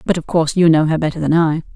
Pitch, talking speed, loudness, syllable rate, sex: 160 Hz, 310 wpm, -15 LUFS, 7.1 syllables/s, female